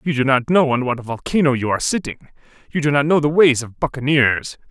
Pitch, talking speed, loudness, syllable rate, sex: 140 Hz, 240 wpm, -18 LUFS, 6.2 syllables/s, male